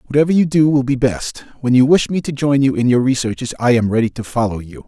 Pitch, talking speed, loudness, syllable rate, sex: 130 Hz, 270 wpm, -16 LUFS, 6.2 syllables/s, male